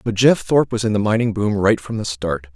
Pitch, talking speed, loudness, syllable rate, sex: 110 Hz, 280 wpm, -18 LUFS, 5.8 syllables/s, male